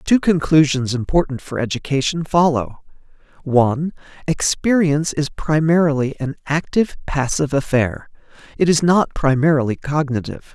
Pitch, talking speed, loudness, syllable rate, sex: 150 Hz, 110 wpm, -18 LUFS, 5.2 syllables/s, male